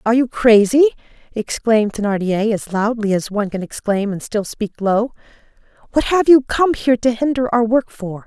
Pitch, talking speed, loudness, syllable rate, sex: 225 Hz, 180 wpm, -17 LUFS, 5.2 syllables/s, female